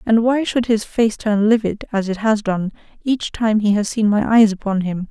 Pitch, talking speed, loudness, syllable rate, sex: 215 Hz, 235 wpm, -18 LUFS, 4.8 syllables/s, female